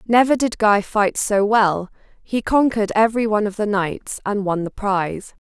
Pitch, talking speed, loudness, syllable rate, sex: 210 Hz, 185 wpm, -19 LUFS, 5.0 syllables/s, female